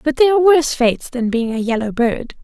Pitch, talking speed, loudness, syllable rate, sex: 260 Hz, 245 wpm, -16 LUFS, 6.5 syllables/s, female